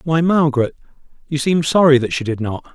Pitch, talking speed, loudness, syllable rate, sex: 145 Hz, 195 wpm, -17 LUFS, 5.7 syllables/s, male